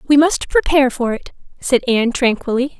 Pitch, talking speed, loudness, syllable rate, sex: 265 Hz, 170 wpm, -16 LUFS, 5.8 syllables/s, female